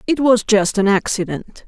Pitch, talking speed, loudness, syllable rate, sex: 210 Hz, 180 wpm, -16 LUFS, 4.6 syllables/s, female